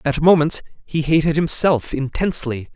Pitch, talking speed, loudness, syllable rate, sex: 155 Hz, 130 wpm, -18 LUFS, 5.0 syllables/s, male